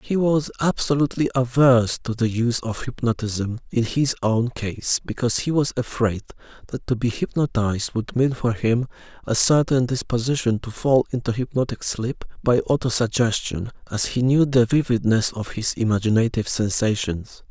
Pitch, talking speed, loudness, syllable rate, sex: 120 Hz, 155 wpm, -22 LUFS, 5.1 syllables/s, male